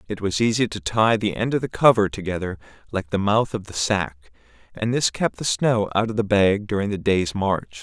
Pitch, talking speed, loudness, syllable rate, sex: 100 Hz, 230 wpm, -22 LUFS, 5.2 syllables/s, male